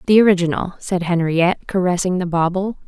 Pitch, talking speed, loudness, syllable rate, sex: 180 Hz, 145 wpm, -18 LUFS, 6.1 syllables/s, female